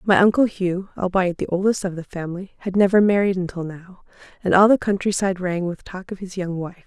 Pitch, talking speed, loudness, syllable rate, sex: 185 Hz, 220 wpm, -21 LUFS, 6.0 syllables/s, female